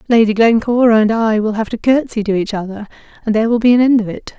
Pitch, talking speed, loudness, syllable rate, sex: 225 Hz, 260 wpm, -14 LUFS, 6.5 syllables/s, female